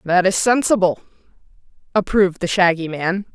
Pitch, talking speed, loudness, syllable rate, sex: 185 Hz, 125 wpm, -18 LUFS, 5.3 syllables/s, female